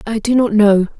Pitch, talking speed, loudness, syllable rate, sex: 215 Hz, 240 wpm, -13 LUFS, 5.1 syllables/s, female